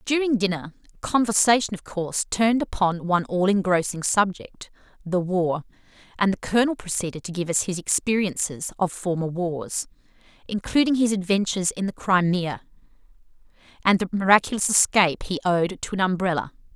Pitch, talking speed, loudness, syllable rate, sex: 190 Hz, 145 wpm, -23 LUFS, 5.5 syllables/s, female